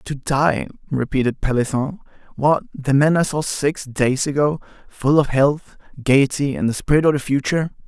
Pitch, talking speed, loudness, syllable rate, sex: 140 Hz, 170 wpm, -19 LUFS, 4.8 syllables/s, male